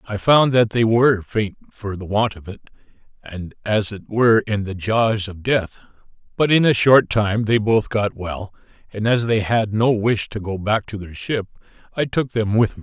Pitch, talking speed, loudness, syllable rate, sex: 110 Hz, 215 wpm, -19 LUFS, 4.6 syllables/s, male